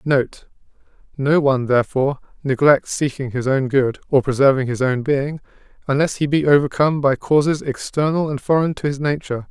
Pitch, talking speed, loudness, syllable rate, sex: 140 Hz, 160 wpm, -18 LUFS, 5.6 syllables/s, male